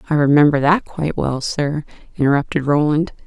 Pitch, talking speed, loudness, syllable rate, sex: 150 Hz, 145 wpm, -17 LUFS, 5.6 syllables/s, female